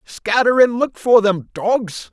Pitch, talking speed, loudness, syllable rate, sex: 215 Hz, 170 wpm, -16 LUFS, 3.5 syllables/s, male